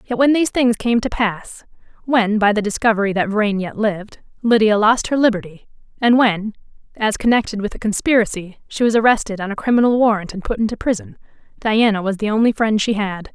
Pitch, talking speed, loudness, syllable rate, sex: 215 Hz, 200 wpm, -17 LUFS, 5.8 syllables/s, female